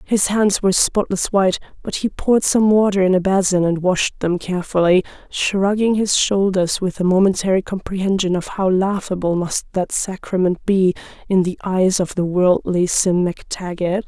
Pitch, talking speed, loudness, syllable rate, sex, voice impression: 190 Hz, 165 wpm, -18 LUFS, 4.8 syllables/s, female, feminine, adult-like, slightly intellectual, slightly sweet